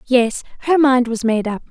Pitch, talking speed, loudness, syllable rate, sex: 245 Hz, 210 wpm, -17 LUFS, 4.8 syllables/s, female